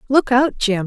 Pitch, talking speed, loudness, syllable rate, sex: 240 Hz, 210 wpm, -17 LUFS, 4.1 syllables/s, female